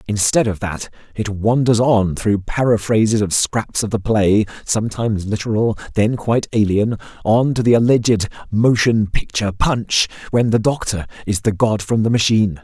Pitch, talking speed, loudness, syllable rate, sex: 110 Hz, 160 wpm, -17 LUFS, 5.0 syllables/s, male